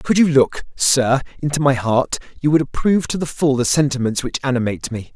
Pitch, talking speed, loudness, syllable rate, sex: 135 Hz, 210 wpm, -18 LUFS, 5.8 syllables/s, male